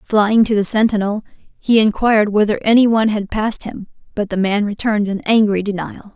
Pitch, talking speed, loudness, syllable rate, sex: 210 Hz, 185 wpm, -16 LUFS, 5.5 syllables/s, female